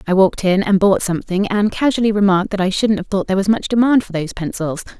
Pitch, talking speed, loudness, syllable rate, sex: 195 Hz, 250 wpm, -17 LUFS, 6.8 syllables/s, female